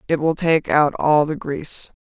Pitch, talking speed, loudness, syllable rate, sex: 150 Hz, 205 wpm, -19 LUFS, 4.5 syllables/s, female